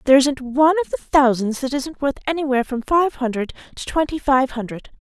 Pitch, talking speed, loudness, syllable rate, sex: 270 Hz, 200 wpm, -19 LUFS, 6.1 syllables/s, female